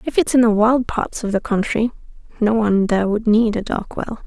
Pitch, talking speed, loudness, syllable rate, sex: 220 Hz, 240 wpm, -18 LUFS, 5.5 syllables/s, female